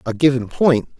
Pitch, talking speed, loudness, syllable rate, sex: 130 Hz, 180 wpm, -17 LUFS, 5.0 syllables/s, male